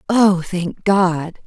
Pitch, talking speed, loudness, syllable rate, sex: 185 Hz, 125 wpm, -17 LUFS, 2.5 syllables/s, female